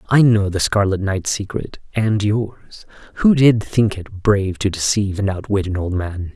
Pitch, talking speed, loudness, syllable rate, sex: 100 Hz, 180 wpm, -18 LUFS, 4.5 syllables/s, male